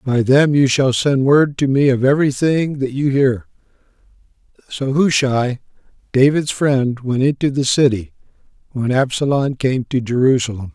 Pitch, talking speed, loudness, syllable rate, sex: 135 Hz, 145 wpm, -16 LUFS, 4.6 syllables/s, male